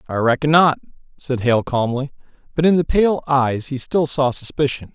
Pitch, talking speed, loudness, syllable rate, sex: 140 Hz, 180 wpm, -18 LUFS, 4.9 syllables/s, male